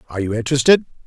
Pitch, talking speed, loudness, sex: 130 Hz, 170 wpm, -17 LUFS, male